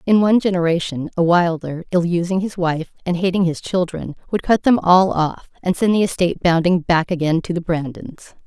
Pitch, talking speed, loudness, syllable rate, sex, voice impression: 175 Hz, 200 wpm, -18 LUFS, 5.3 syllables/s, female, feminine, slightly middle-aged, clear, slightly intellectual, sincere, calm, slightly elegant